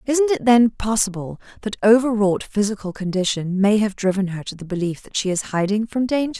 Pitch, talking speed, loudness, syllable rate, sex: 210 Hz, 205 wpm, -20 LUFS, 5.5 syllables/s, female